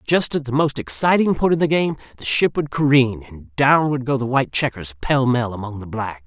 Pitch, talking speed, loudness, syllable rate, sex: 125 Hz, 240 wpm, -19 LUFS, 5.3 syllables/s, male